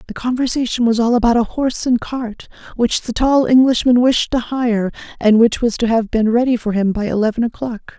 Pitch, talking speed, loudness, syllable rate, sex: 235 Hz, 210 wpm, -16 LUFS, 5.4 syllables/s, female